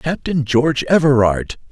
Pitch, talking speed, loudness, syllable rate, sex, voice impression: 135 Hz, 105 wpm, -16 LUFS, 4.4 syllables/s, male, very masculine, very middle-aged, very thick, tensed, slightly powerful, bright, slightly soft, slightly muffled, fluent, raspy, cool, intellectual, slightly refreshing, sincere, calm, slightly friendly, reassuring, unique, slightly elegant, wild, lively, slightly strict, intense, slightly modest